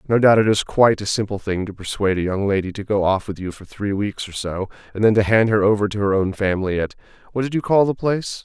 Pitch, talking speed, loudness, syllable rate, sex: 105 Hz, 275 wpm, -20 LUFS, 6.4 syllables/s, male